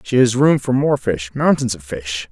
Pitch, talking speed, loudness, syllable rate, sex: 115 Hz, 235 wpm, -17 LUFS, 4.5 syllables/s, male